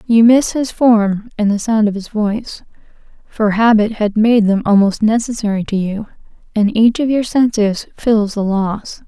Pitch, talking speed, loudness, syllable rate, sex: 215 Hz, 180 wpm, -15 LUFS, 4.4 syllables/s, female